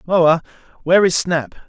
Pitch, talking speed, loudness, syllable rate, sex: 170 Hz, 145 wpm, -16 LUFS, 5.0 syllables/s, male